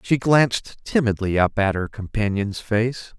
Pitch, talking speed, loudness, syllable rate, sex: 110 Hz, 150 wpm, -21 LUFS, 4.2 syllables/s, male